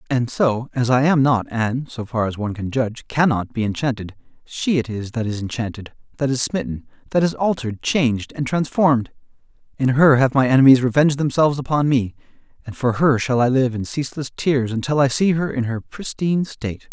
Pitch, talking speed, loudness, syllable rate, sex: 130 Hz, 200 wpm, -19 LUFS, 5.7 syllables/s, male